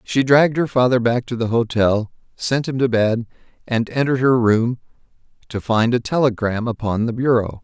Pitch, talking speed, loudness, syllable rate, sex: 120 Hz, 175 wpm, -18 LUFS, 5.2 syllables/s, male